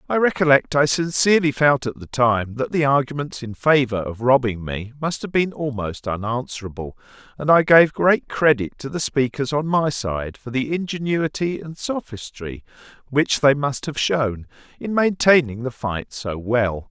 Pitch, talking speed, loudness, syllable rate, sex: 135 Hz, 170 wpm, -20 LUFS, 4.6 syllables/s, male